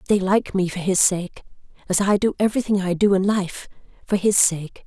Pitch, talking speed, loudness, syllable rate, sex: 190 Hz, 210 wpm, -20 LUFS, 5.2 syllables/s, female